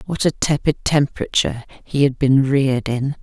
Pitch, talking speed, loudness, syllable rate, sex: 135 Hz, 165 wpm, -18 LUFS, 5.2 syllables/s, female